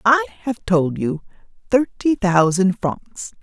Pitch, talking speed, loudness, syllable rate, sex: 195 Hz, 125 wpm, -19 LUFS, 3.5 syllables/s, female